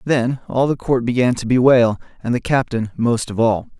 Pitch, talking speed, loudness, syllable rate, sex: 120 Hz, 205 wpm, -18 LUFS, 4.9 syllables/s, male